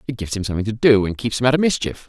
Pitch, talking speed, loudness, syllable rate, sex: 115 Hz, 345 wpm, -19 LUFS, 8.4 syllables/s, male